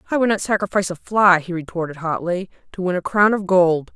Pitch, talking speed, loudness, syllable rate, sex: 185 Hz, 230 wpm, -19 LUFS, 6.0 syllables/s, female